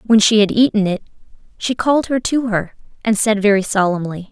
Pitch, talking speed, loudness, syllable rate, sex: 215 Hz, 195 wpm, -16 LUFS, 5.6 syllables/s, female